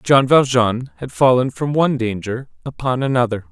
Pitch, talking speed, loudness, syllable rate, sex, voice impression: 130 Hz, 155 wpm, -17 LUFS, 5.2 syllables/s, male, masculine, adult-like, relaxed, powerful, muffled, slightly cool, slightly mature, slightly friendly, wild, lively, slightly intense, slightly sharp